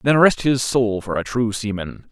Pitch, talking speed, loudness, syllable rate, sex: 115 Hz, 225 wpm, -20 LUFS, 4.5 syllables/s, male